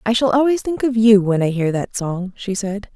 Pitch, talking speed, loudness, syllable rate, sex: 210 Hz, 265 wpm, -18 LUFS, 5.0 syllables/s, female